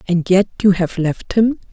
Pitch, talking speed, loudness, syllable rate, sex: 190 Hz, 210 wpm, -16 LUFS, 4.4 syllables/s, female